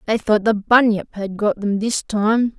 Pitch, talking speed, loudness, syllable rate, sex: 215 Hz, 210 wpm, -18 LUFS, 4.2 syllables/s, male